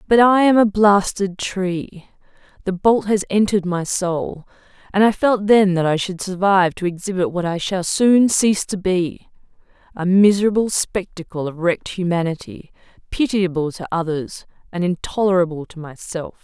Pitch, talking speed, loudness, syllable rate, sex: 190 Hz, 150 wpm, -18 LUFS, 4.9 syllables/s, female